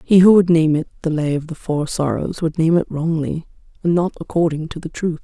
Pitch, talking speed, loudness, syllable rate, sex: 160 Hz, 240 wpm, -18 LUFS, 5.5 syllables/s, female